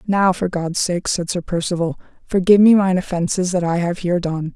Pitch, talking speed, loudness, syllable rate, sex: 180 Hz, 210 wpm, -18 LUFS, 5.8 syllables/s, female